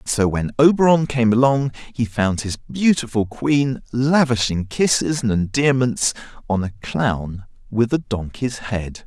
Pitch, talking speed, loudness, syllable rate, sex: 120 Hz, 145 wpm, -19 LUFS, 4.3 syllables/s, male